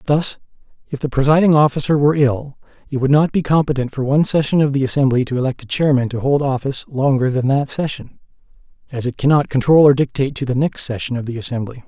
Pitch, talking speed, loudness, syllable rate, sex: 135 Hz, 210 wpm, -17 LUFS, 6.5 syllables/s, male